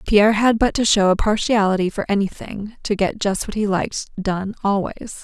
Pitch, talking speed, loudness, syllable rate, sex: 205 Hz, 195 wpm, -19 LUFS, 5.2 syllables/s, female